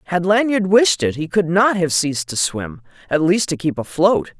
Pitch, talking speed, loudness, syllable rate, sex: 180 Hz, 220 wpm, -17 LUFS, 4.9 syllables/s, female